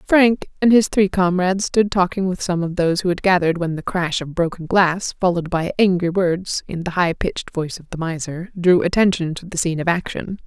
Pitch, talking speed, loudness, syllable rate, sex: 180 Hz, 225 wpm, -19 LUFS, 5.6 syllables/s, female